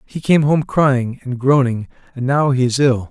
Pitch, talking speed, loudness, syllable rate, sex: 130 Hz, 210 wpm, -16 LUFS, 4.4 syllables/s, male